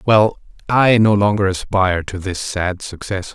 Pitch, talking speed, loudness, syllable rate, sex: 100 Hz, 160 wpm, -17 LUFS, 4.4 syllables/s, male